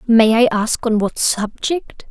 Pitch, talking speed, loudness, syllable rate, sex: 230 Hz, 170 wpm, -16 LUFS, 3.7 syllables/s, female